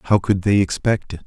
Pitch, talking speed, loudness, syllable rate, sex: 100 Hz, 240 wpm, -19 LUFS, 4.9 syllables/s, male